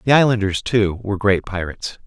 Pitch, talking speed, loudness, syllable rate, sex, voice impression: 105 Hz, 175 wpm, -19 LUFS, 6.1 syllables/s, male, very masculine, very adult-like, middle-aged, very thick, slightly relaxed, slightly powerful, slightly dark, slightly soft, slightly clear, fluent, cool, very intellectual, slightly refreshing, sincere, very calm, friendly, very reassuring, slightly unique, slightly elegant, sweet, slightly lively, kind, slightly modest